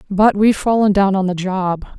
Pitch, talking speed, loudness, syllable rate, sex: 195 Hz, 210 wpm, -16 LUFS, 5.4 syllables/s, female